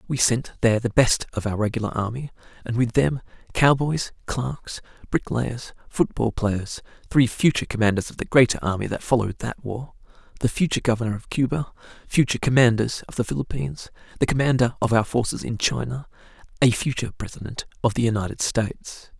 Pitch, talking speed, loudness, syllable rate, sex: 120 Hz, 165 wpm, -23 LUFS, 5.8 syllables/s, male